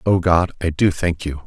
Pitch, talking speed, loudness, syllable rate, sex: 85 Hz, 245 wpm, -19 LUFS, 4.8 syllables/s, male